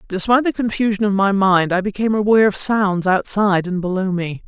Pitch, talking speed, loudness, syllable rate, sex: 200 Hz, 200 wpm, -17 LUFS, 6.1 syllables/s, female